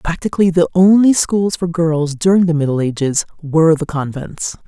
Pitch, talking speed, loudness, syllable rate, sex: 165 Hz, 165 wpm, -15 LUFS, 5.2 syllables/s, female